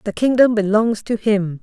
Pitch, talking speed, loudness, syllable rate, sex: 215 Hz, 185 wpm, -17 LUFS, 4.6 syllables/s, female